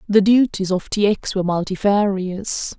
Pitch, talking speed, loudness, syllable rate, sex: 200 Hz, 150 wpm, -19 LUFS, 4.6 syllables/s, female